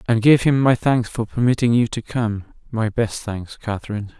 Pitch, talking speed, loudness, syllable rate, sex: 115 Hz, 185 wpm, -20 LUFS, 5.0 syllables/s, male